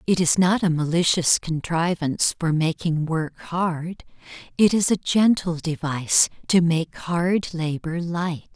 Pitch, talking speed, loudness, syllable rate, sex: 170 Hz, 140 wpm, -22 LUFS, 4.0 syllables/s, female